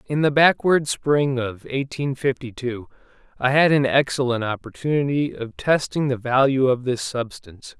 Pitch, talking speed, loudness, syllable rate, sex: 130 Hz, 155 wpm, -21 LUFS, 4.6 syllables/s, male